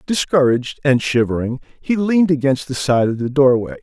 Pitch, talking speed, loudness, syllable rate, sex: 135 Hz, 175 wpm, -17 LUFS, 5.5 syllables/s, male